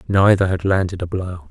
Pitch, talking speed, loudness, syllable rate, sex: 95 Hz, 200 wpm, -18 LUFS, 5.2 syllables/s, male